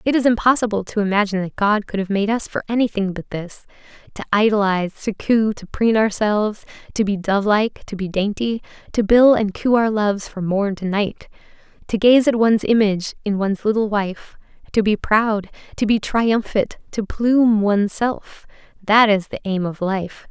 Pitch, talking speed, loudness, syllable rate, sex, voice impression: 210 Hz, 185 wpm, -19 LUFS, 5.1 syllables/s, female, very feminine, very adult-like, slightly thin, slightly relaxed, slightly weak, bright, very soft, very clear, fluent, slightly raspy, very cute, very intellectual, very refreshing, sincere, very calm, very friendly, very reassuring, very unique, very elegant, slightly wild, very sweet, lively, very kind, slightly sharp, modest, light